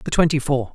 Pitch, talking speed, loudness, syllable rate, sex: 140 Hz, 240 wpm, -20 LUFS, 6.6 syllables/s, male